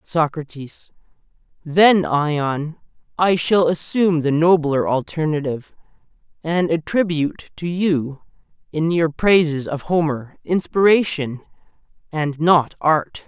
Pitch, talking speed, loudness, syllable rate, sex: 160 Hz, 100 wpm, -19 LUFS, 3.9 syllables/s, male